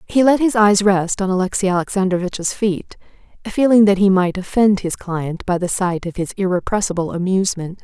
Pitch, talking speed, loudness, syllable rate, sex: 190 Hz, 175 wpm, -17 LUFS, 5.5 syllables/s, female